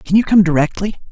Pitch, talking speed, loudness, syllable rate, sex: 185 Hz, 215 wpm, -14 LUFS, 6.5 syllables/s, male